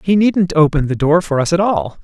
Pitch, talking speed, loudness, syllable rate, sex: 165 Hz, 265 wpm, -15 LUFS, 5.4 syllables/s, male